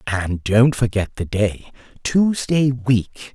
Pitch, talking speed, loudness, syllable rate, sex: 115 Hz, 125 wpm, -19 LUFS, 3.3 syllables/s, male